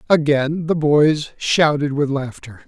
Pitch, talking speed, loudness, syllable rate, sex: 145 Hz, 135 wpm, -18 LUFS, 3.8 syllables/s, male